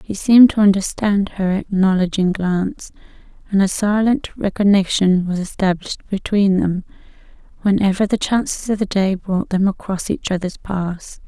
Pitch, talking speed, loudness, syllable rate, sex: 195 Hz, 145 wpm, -18 LUFS, 4.8 syllables/s, female